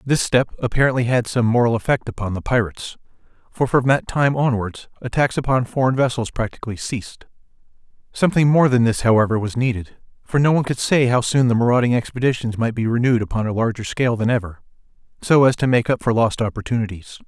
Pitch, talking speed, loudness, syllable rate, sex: 120 Hz, 190 wpm, -19 LUFS, 6.3 syllables/s, male